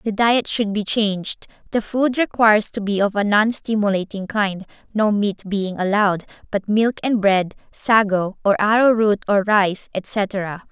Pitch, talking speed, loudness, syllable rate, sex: 205 Hz, 160 wpm, -19 LUFS, 4.2 syllables/s, female